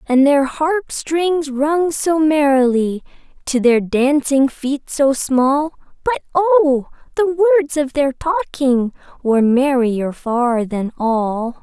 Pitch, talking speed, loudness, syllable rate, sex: 280 Hz, 130 wpm, -17 LUFS, 3.2 syllables/s, female